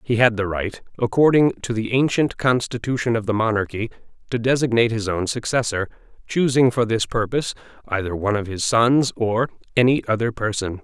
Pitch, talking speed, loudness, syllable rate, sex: 115 Hz, 165 wpm, -21 LUFS, 5.6 syllables/s, male